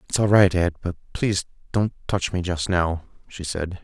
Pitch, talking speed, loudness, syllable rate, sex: 90 Hz, 205 wpm, -23 LUFS, 4.9 syllables/s, male